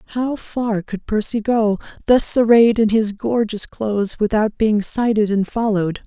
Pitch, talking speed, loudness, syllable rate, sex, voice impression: 215 Hz, 160 wpm, -18 LUFS, 4.4 syllables/s, female, feminine, adult-like, tensed, powerful, slightly soft, clear, slightly fluent, intellectual, calm, elegant, lively, slightly intense, slightly sharp